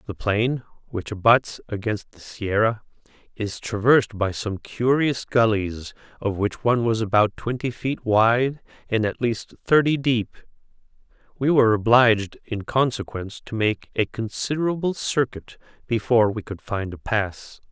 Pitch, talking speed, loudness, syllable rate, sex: 110 Hz, 140 wpm, -22 LUFS, 4.5 syllables/s, male